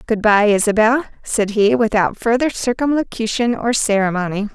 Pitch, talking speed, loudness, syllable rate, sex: 220 Hz, 130 wpm, -17 LUFS, 5.0 syllables/s, female